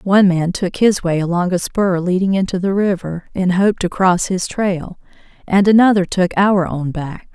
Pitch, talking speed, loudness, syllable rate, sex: 185 Hz, 195 wpm, -16 LUFS, 4.7 syllables/s, female